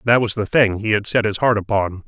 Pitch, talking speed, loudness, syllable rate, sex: 110 Hz, 290 wpm, -18 LUFS, 5.7 syllables/s, male